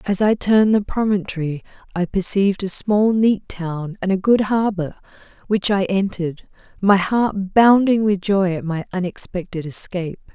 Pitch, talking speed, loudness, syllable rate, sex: 195 Hz, 155 wpm, -19 LUFS, 4.7 syllables/s, female